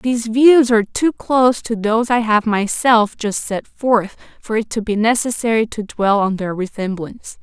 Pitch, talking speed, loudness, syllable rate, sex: 225 Hz, 185 wpm, -17 LUFS, 4.7 syllables/s, female